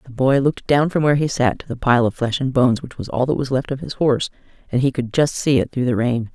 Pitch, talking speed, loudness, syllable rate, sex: 130 Hz, 310 wpm, -19 LUFS, 6.3 syllables/s, female